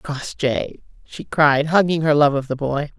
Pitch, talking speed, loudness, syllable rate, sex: 145 Hz, 180 wpm, -19 LUFS, 4.1 syllables/s, female